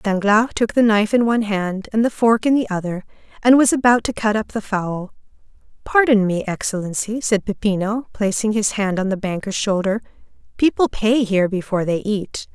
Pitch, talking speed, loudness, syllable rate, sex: 210 Hz, 185 wpm, -19 LUFS, 5.3 syllables/s, female